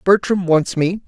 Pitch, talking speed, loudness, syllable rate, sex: 185 Hz, 165 wpm, -17 LUFS, 4.3 syllables/s, male